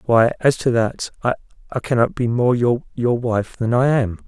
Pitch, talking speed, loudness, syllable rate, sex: 120 Hz, 170 wpm, -19 LUFS, 4.6 syllables/s, male